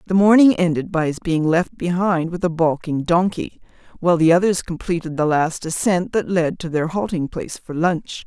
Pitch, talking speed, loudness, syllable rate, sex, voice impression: 170 Hz, 195 wpm, -19 LUFS, 5.1 syllables/s, female, very feminine, very middle-aged, thin, very tensed, powerful, slightly bright, hard, clear, fluent, slightly raspy, cool, slightly intellectual, slightly refreshing, sincere, slightly calm, slightly friendly, slightly reassuring, unique, slightly elegant, wild, slightly sweet, lively, very strict, intense, sharp